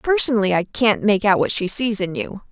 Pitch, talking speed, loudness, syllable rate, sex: 205 Hz, 240 wpm, -18 LUFS, 5.3 syllables/s, female